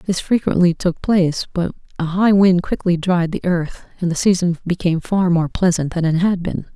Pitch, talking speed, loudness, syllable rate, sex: 175 Hz, 205 wpm, -18 LUFS, 5.2 syllables/s, female